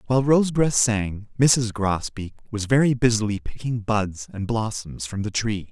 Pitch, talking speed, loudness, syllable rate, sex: 110 Hz, 160 wpm, -23 LUFS, 4.6 syllables/s, male